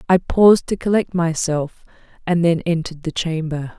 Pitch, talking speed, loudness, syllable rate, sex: 170 Hz, 160 wpm, -18 LUFS, 5.1 syllables/s, female